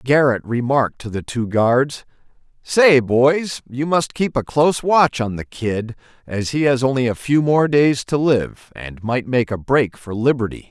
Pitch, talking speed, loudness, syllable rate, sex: 130 Hz, 190 wpm, -18 LUFS, 4.2 syllables/s, male